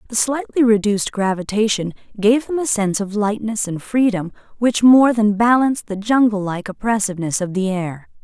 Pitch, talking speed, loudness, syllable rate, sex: 215 Hz, 160 wpm, -18 LUFS, 5.4 syllables/s, female